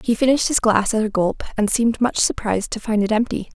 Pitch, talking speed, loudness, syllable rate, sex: 220 Hz, 250 wpm, -19 LUFS, 6.4 syllables/s, female